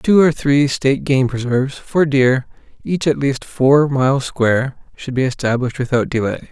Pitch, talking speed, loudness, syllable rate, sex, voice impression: 135 Hz, 175 wpm, -17 LUFS, 4.9 syllables/s, male, very masculine, very adult-like, old, thick, relaxed, slightly weak, slightly dark, soft, muffled, slightly halting, raspy, cool, intellectual, sincere, very calm, very mature, friendly, reassuring, unique, elegant, slightly wild, slightly sweet, slightly lively, very kind, very modest